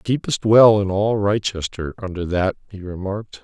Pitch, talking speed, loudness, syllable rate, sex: 100 Hz, 155 wpm, -19 LUFS, 4.8 syllables/s, male